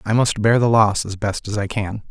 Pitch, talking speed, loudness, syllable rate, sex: 105 Hz, 285 wpm, -19 LUFS, 5.1 syllables/s, male